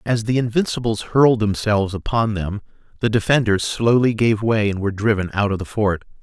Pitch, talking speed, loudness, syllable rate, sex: 110 Hz, 185 wpm, -19 LUFS, 5.6 syllables/s, male